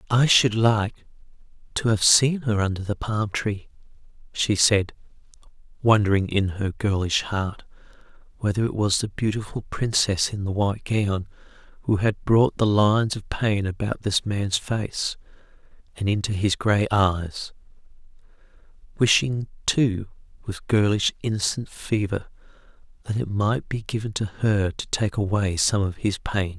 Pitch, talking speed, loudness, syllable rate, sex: 105 Hz, 140 wpm, -23 LUFS, 4.3 syllables/s, male